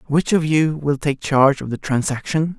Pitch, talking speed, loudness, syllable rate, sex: 145 Hz, 210 wpm, -19 LUFS, 5.0 syllables/s, male